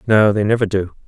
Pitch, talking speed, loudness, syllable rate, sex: 105 Hz, 225 wpm, -16 LUFS, 6.0 syllables/s, male